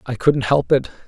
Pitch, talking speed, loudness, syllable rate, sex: 120 Hz, 225 wpm, -18 LUFS, 4.9 syllables/s, male